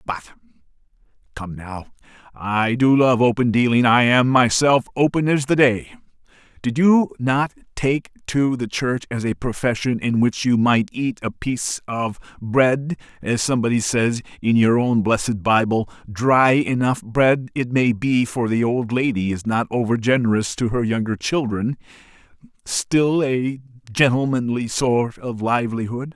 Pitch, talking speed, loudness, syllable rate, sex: 120 Hz, 135 wpm, -19 LUFS, 4.2 syllables/s, male